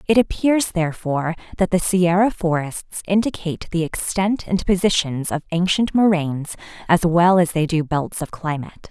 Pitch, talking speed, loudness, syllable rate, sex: 175 Hz, 155 wpm, -20 LUFS, 5.1 syllables/s, female